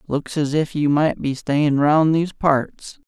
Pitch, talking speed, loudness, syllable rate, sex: 150 Hz, 195 wpm, -19 LUFS, 3.8 syllables/s, male